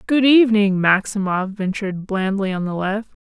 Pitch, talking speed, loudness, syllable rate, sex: 205 Hz, 150 wpm, -18 LUFS, 5.0 syllables/s, female